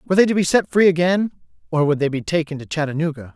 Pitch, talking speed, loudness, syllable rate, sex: 165 Hz, 250 wpm, -19 LUFS, 7.2 syllables/s, male